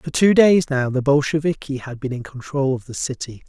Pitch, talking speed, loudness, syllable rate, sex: 140 Hz, 225 wpm, -19 LUFS, 5.3 syllables/s, male